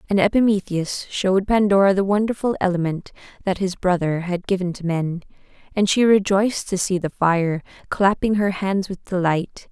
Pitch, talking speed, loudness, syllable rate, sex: 190 Hz, 160 wpm, -20 LUFS, 5.0 syllables/s, female